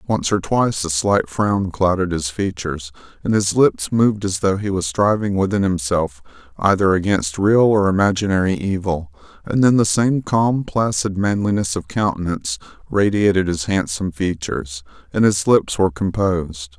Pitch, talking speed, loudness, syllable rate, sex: 95 Hz, 155 wpm, -18 LUFS, 4.9 syllables/s, male